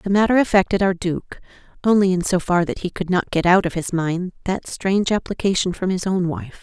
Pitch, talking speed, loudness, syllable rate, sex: 185 Hz, 215 wpm, -20 LUFS, 5.5 syllables/s, female